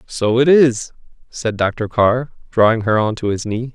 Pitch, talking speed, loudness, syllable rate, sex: 115 Hz, 190 wpm, -16 LUFS, 4.3 syllables/s, male